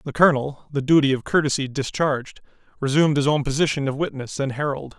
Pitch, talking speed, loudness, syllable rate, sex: 140 Hz, 180 wpm, -22 LUFS, 6.4 syllables/s, male